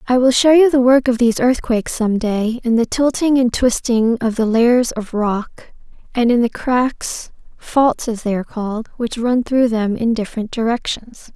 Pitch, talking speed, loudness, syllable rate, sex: 235 Hz, 195 wpm, -17 LUFS, 4.3 syllables/s, female